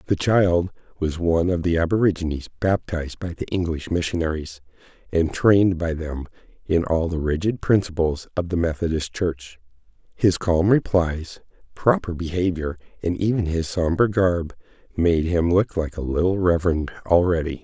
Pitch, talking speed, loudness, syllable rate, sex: 85 Hz, 145 wpm, -22 LUFS, 4.9 syllables/s, male